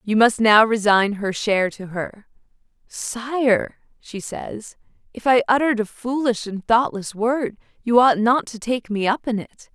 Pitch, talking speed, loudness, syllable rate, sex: 225 Hz, 170 wpm, -20 LUFS, 4.2 syllables/s, female